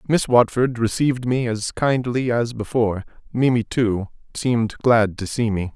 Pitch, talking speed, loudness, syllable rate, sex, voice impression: 120 Hz, 155 wpm, -20 LUFS, 4.6 syllables/s, male, masculine, adult-like, middle-aged, thick, tensed, slightly powerful, slightly bright, slightly hard, clear, slightly fluent, cool, slightly intellectual, sincere, very calm, mature, slightly friendly, reassuring, slightly unique, slightly wild, slightly lively, kind, modest